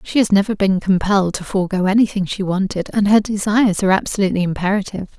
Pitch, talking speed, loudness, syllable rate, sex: 195 Hz, 185 wpm, -17 LUFS, 7.0 syllables/s, female